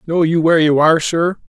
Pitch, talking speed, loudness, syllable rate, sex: 165 Hz, 230 wpm, -14 LUFS, 6.3 syllables/s, male